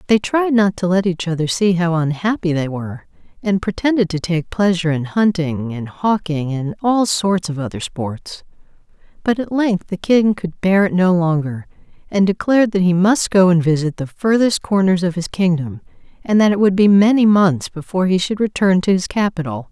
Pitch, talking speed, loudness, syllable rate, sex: 180 Hz, 200 wpm, -17 LUFS, 5.1 syllables/s, female